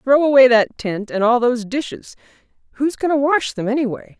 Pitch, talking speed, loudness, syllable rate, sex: 255 Hz, 185 wpm, -17 LUFS, 5.6 syllables/s, female